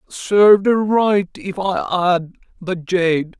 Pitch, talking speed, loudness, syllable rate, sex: 185 Hz, 140 wpm, -17 LUFS, 3.1 syllables/s, male